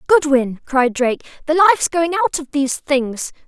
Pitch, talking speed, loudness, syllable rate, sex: 290 Hz, 175 wpm, -17 LUFS, 4.8 syllables/s, female